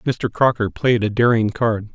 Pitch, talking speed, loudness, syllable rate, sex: 115 Hz, 185 wpm, -18 LUFS, 4.2 syllables/s, male